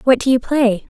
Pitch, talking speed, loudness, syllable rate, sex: 250 Hz, 240 wpm, -16 LUFS, 5.3 syllables/s, female